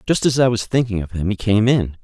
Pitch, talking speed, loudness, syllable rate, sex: 110 Hz, 295 wpm, -18 LUFS, 6.0 syllables/s, male